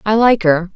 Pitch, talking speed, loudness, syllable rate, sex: 200 Hz, 240 wpm, -13 LUFS, 4.7 syllables/s, female